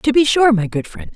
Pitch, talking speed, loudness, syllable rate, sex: 220 Hz, 310 wpm, -15 LUFS, 5.5 syllables/s, female